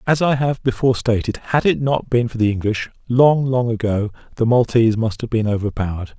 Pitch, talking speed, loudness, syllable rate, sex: 115 Hz, 205 wpm, -18 LUFS, 5.7 syllables/s, male